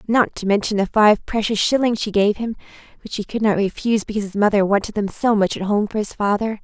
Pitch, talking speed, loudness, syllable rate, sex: 210 Hz, 245 wpm, -19 LUFS, 6.2 syllables/s, female